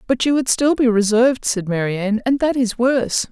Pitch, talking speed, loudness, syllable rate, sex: 240 Hz, 215 wpm, -17 LUFS, 5.5 syllables/s, female